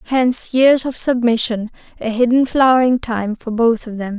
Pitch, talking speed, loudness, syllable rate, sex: 240 Hz, 170 wpm, -16 LUFS, 4.9 syllables/s, female